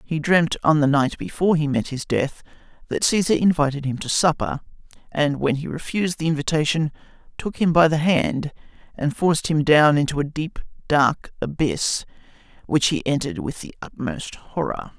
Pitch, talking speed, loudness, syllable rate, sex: 150 Hz, 170 wpm, -21 LUFS, 5.1 syllables/s, male